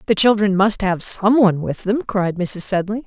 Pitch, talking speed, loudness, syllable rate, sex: 200 Hz, 195 wpm, -17 LUFS, 4.8 syllables/s, female